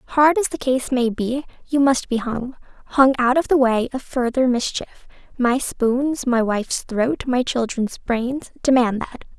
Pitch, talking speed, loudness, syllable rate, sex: 255 Hz, 180 wpm, -20 LUFS, 4.2 syllables/s, female